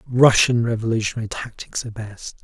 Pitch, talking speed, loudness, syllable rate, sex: 115 Hz, 125 wpm, -20 LUFS, 5.8 syllables/s, male